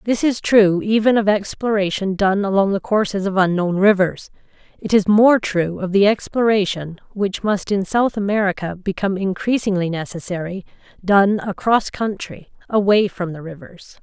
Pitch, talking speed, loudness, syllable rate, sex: 195 Hz, 150 wpm, -18 LUFS, 4.8 syllables/s, female